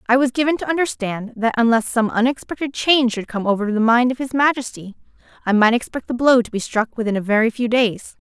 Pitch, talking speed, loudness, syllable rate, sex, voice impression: 240 Hz, 225 wpm, -18 LUFS, 6.1 syllables/s, female, feminine, slightly adult-like, clear, intellectual, lively, slightly sharp